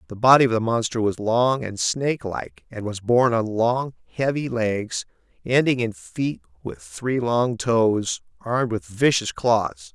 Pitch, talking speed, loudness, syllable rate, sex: 115 Hz, 165 wpm, -22 LUFS, 4.3 syllables/s, male